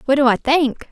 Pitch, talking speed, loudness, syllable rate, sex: 270 Hz, 265 wpm, -16 LUFS, 6.1 syllables/s, female